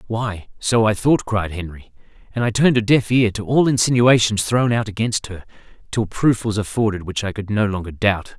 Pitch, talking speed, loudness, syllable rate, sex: 110 Hz, 210 wpm, -19 LUFS, 5.2 syllables/s, male